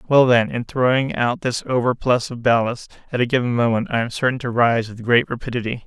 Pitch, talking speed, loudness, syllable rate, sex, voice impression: 120 Hz, 215 wpm, -19 LUFS, 5.6 syllables/s, male, masculine, slightly middle-aged, thick, relaxed, slightly weak, dark, slightly soft, slightly muffled, fluent, slightly cool, intellectual, refreshing, very sincere, calm, mature, friendly, reassuring, slightly unique, slightly elegant, slightly wild, slightly sweet, slightly lively, kind, very modest, light